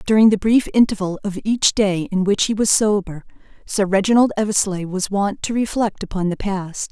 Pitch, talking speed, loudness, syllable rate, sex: 200 Hz, 190 wpm, -18 LUFS, 5.1 syllables/s, female